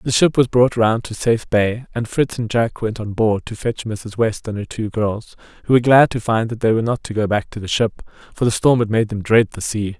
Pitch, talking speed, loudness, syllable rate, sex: 110 Hz, 280 wpm, -18 LUFS, 5.5 syllables/s, male